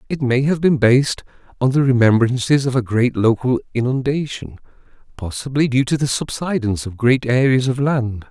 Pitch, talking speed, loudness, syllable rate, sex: 125 Hz, 165 wpm, -18 LUFS, 5.3 syllables/s, male